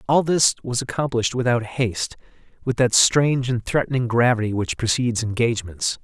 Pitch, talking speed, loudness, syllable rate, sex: 120 Hz, 150 wpm, -21 LUFS, 5.7 syllables/s, male